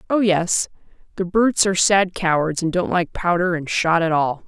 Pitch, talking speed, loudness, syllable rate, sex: 180 Hz, 200 wpm, -19 LUFS, 5.0 syllables/s, female